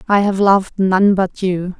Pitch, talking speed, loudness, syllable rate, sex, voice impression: 190 Hz, 200 wpm, -15 LUFS, 4.4 syllables/s, female, slightly feminine, adult-like, slightly halting, slightly calm